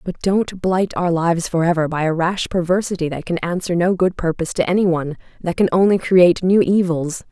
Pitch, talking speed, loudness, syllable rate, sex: 175 Hz, 205 wpm, -18 LUFS, 5.7 syllables/s, female